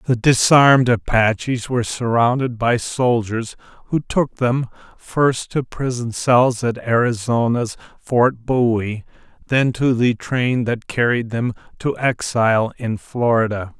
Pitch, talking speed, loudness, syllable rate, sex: 120 Hz, 125 wpm, -18 LUFS, 3.9 syllables/s, male